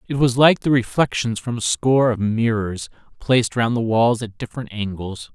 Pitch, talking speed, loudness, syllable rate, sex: 115 Hz, 190 wpm, -19 LUFS, 5.1 syllables/s, male